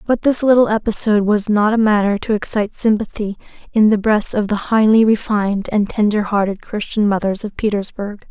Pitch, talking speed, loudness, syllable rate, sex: 210 Hz, 180 wpm, -16 LUFS, 5.5 syllables/s, female